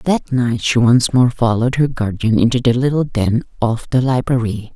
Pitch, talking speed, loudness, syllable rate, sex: 120 Hz, 190 wpm, -16 LUFS, 4.9 syllables/s, female